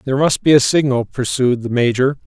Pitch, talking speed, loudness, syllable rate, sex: 130 Hz, 205 wpm, -16 LUFS, 5.7 syllables/s, male